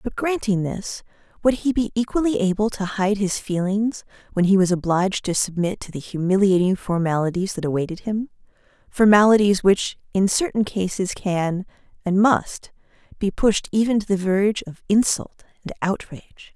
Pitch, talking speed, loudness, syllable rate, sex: 200 Hz, 150 wpm, -21 LUFS, 5.0 syllables/s, female